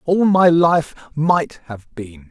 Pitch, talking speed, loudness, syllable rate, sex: 150 Hz, 155 wpm, -15 LUFS, 3.2 syllables/s, male